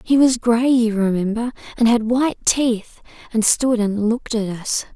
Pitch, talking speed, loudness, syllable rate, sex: 230 Hz, 180 wpm, -19 LUFS, 4.6 syllables/s, female